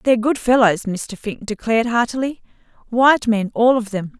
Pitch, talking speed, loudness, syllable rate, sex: 230 Hz, 170 wpm, -18 LUFS, 5.3 syllables/s, female